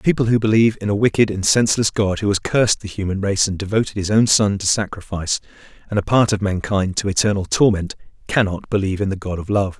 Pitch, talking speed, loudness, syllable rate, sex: 100 Hz, 215 wpm, -18 LUFS, 6.4 syllables/s, male